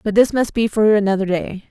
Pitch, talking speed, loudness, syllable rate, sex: 205 Hz, 245 wpm, -17 LUFS, 5.8 syllables/s, female